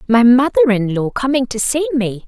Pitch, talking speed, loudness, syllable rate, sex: 250 Hz, 210 wpm, -15 LUFS, 5.4 syllables/s, female